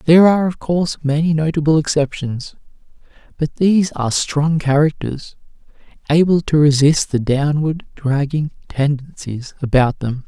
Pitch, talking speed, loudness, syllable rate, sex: 150 Hz, 125 wpm, -17 LUFS, 4.8 syllables/s, male